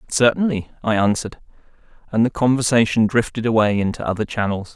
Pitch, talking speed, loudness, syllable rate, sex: 115 Hz, 140 wpm, -19 LUFS, 6.0 syllables/s, male